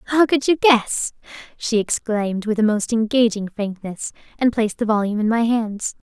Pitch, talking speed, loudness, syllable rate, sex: 225 Hz, 180 wpm, -20 LUFS, 5.1 syllables/s, female